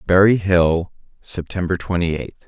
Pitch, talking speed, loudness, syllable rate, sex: 90 Hz, 120 wpm, -18 LUFS, 4.4 syllables/s, male